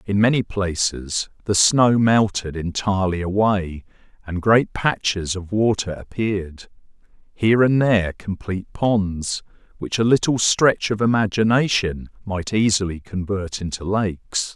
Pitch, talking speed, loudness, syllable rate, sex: 100 Hz, 125 wpm, -20 LUFS, 4.4 syllables/s, male